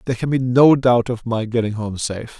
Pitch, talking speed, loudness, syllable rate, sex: 120 Hz, 250 wpm, -18 LUFS, 5.8 syllables/s, male